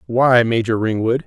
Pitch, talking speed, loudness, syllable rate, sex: 120 Hz, 145 wpm, -16 LUFS, 4.5 syllables/s, male